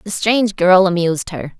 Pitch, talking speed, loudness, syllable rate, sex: 185 Hz, 190 wpm, -15 LUFS, 5.2 syllables/s, female